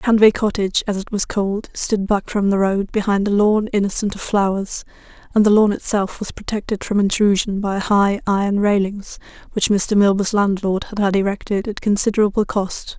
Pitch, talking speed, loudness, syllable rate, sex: 200 Hz, 180 wpm, -18 LUFS, 5.2 syllables/s, female